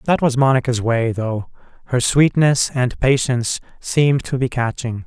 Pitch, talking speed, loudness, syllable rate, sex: 125 Hz, 155 wpm, -18 LUFS, 4.6 syllables/s, male